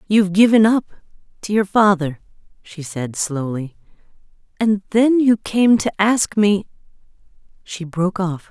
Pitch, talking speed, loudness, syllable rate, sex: 195 Hz, 125 wpm, -17 LUFS, 4.4 syllables/s, female